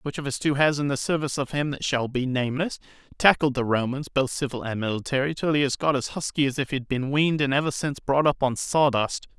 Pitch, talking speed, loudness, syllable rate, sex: 140 Hz, 250 wpm, -24 LUFS, 6.1 syllables/s, male